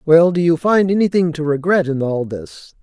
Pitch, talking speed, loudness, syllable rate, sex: 165 Hz, 215 wpm, -16 LUFS, 4.9 syllables/s, male